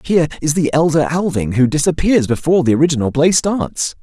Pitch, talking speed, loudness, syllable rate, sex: 150 Hz, 180 wpm, -15 LUFS, 6.0 syllables/s, male